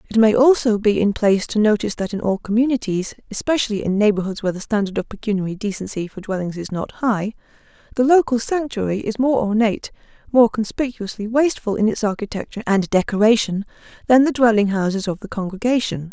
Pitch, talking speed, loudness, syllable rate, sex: 215 Hz, 175 wpm, -19 LUFS, 6.2 syllables/s, female